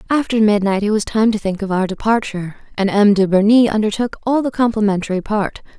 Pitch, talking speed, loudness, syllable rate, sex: 210 Hz, 195 wpm, -16 LUFS, 6.0 syllables/s, female